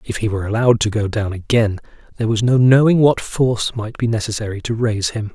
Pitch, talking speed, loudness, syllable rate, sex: 110 Hz, 225 wpm, -17 LUFS, 6.4 syllables/s, male